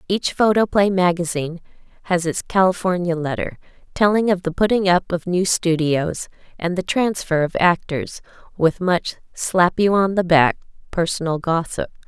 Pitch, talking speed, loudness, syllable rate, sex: 180 Hz, 145 wpm, -19 LUFS, 4.7 syllables/s, female